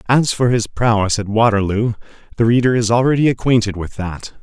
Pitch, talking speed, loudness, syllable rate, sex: 115 Hz, 175 wpm, -16 LUFS, 5.5 syllables/s, male